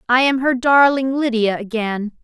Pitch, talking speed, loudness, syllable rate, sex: 245 Hz, 160 wpm, -17 LUFS, 4.5 syllables/s, female